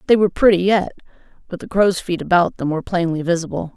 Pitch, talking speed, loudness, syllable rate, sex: 180 Hz, 205 wpm, -18 LUFS, 6.7 syllables/s, female